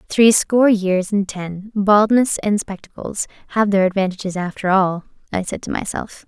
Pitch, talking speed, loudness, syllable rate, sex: 200 Hz, 165 wpm, -18 LUFS, 4.7 syllables/s, female